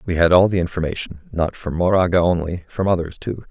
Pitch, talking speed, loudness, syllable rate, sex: 90 Hz, 205 wpm, -19 LUFS, 5.9 syllables/s, male